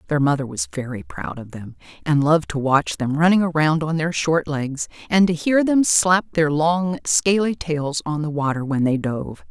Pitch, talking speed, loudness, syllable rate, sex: 150 Hz, 210 wpm, -20 LUFS, 4.7 syllables/s, female